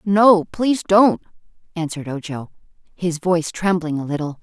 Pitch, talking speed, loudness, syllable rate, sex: 175 Hz, 135 wpm, -19 LUFS, 5.1 syllables/s, female